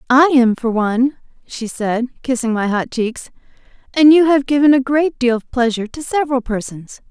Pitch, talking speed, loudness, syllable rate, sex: 255 Hz, 185 wpm, -16 LUFS, 5.2 syllables/s, female